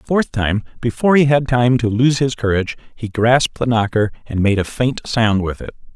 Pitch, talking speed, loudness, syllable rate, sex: 115 Hz, 220 wpm, -17 LUFS, 5.4 syllables/s, male